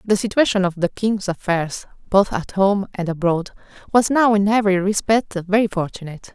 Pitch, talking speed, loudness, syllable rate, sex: 195 Hz, 170 wpm, -19 LUFS, 5.2 syllables/s, female